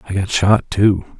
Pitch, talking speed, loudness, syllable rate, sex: 95 Hz, 200 wpm, -16 LUFS, 4.0 syllables/s, male